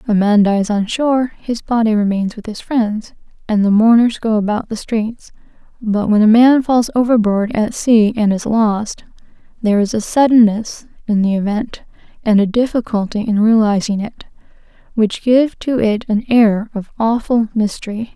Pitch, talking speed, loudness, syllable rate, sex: 220 Hz, 170 wpm, -15 LUFS, 4.7 syllables/s, female